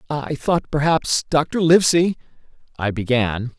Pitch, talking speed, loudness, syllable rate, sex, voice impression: 145 Hz, 115 wpm, -19 LUFS, 4.1 syllables/s, male, masculine, adult-like, slightly thick, sincere, slightly friendly